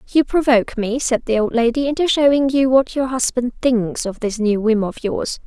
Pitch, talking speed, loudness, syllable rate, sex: 245 Hz, 220 wpm, -18 LUFS, 5.1 syllables/s, female